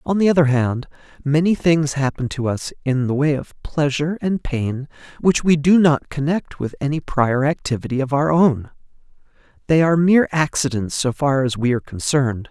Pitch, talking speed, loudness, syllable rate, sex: 145 Hz, 180 wpm, -19 LUFS, 5.3 syllables/s, male